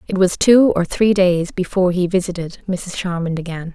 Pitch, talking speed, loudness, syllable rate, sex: 180 Hz, 190 wpm, -17 LUFS, 5.1 syllables/s, female